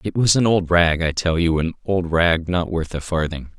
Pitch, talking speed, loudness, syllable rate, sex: 85 Hz, 250 wpm, -19 LUFS, 4.8 syllables/s, male